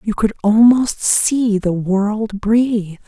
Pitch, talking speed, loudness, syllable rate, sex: 215 Hz, 135 wpm, -15 LUFS, 3.2 syllables/s, female